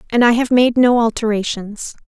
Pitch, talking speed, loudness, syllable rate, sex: 230 Hz, 175 wpm, -15 LUFS, 5.0 syllables/s, female